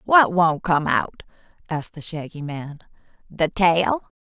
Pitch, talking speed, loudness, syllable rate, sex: 165 Hz, 140 wpm, -21 LUFS, 3.9 syllables/s, female